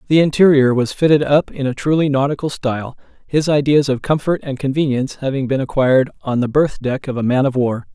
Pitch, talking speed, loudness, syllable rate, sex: 135 Hz, 210 wpm, -17 LUFS, 5.9 syllables/s, male